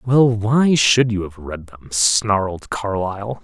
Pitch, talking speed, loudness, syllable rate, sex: 105 Hz, 155 wpm, -18 LUFS, 3.6 syllables/s, male